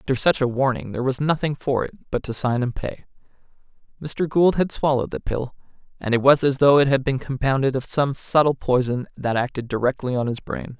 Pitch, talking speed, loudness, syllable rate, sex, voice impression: 130 Hz, 215 wpm, -21 LUFS, 5.6 syllables/s, male, masculine, slightly young, slightly adult-like, slightly thick, slightly tensed, slightly weak, slightly bright, hard, clear, slightly fluent, slightly cool, intellectual, refreshing, sincere, calm, slightly mature, friendly, reassuring, slightly unique, elegant, slightly sweet, slightly lively, kind, slightly modest